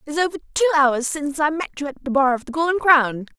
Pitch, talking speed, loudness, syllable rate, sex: 295 Hz, 285 wpm, -20 LUFS, 6.8 syllables/s, female